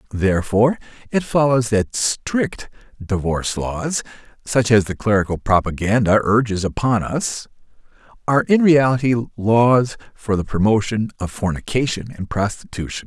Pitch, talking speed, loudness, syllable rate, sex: 110 Hz, 120 wpm, -19 LUFS, 4.7 syllables/s, male